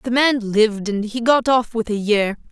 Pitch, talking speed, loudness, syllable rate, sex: 225 Hz, 240 wpm, -18 LUFS, 4.7 syllables/s, female